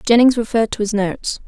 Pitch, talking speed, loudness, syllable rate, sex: 225 Hz, 205 wpm, -17 LUFS, 6.5 syllables/s, female